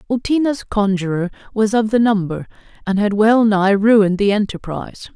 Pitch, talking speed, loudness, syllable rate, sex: 210 Hz, 140 wpm, -17 LUFS, 5.1 syllables/s, female